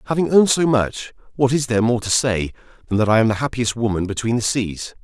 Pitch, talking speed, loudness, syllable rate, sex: 115 Hz, 240 wpm, -19 LUFS, 6.2 syllables/s, male